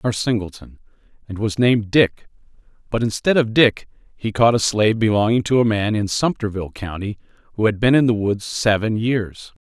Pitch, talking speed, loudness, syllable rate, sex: 110 Hz, 185 wpm, -19 LUFS, 5.5 syllables/s, male